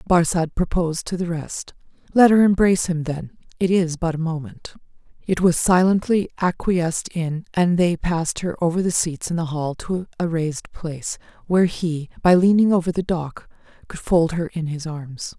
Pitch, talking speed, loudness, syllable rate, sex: 170 Hz, 185 wpm, -21 LUFS, 4.9 syllables/s, female